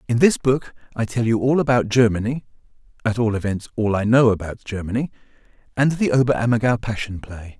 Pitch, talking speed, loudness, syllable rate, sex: 115 Hz, 165 wpm, -20 LUFS, 5.8 syllables/s, male